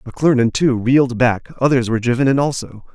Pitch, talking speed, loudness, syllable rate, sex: 125 Hz, 185 wpm, -16 LUFS, 6.4 syllables/s, male